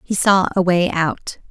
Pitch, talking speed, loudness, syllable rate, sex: 180 Hz, 200 wpm, -17 LUFS, 4.0 syllables/s, female